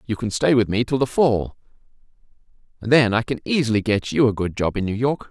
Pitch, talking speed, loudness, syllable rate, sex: 115 Hz, 240 wpm, -20 LUFS, 5.9 syllables/s, male